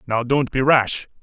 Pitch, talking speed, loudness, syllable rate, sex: 125 Hz, 195 wpm, -19 LUFS, 4.2 syllables/s, male